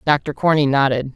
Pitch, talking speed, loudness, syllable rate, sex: 140 Hz, 155 wpm, -17 LUFS, 4.8 syllables/s, female